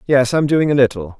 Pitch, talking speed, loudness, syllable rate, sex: 130 Hz, 300 wpm, -15 LUFS, 6.8 syllables/s, male